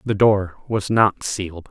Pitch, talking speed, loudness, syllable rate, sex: 100 Hz, 175 wpm, -20 LUFS, 4.1 syllables/s, male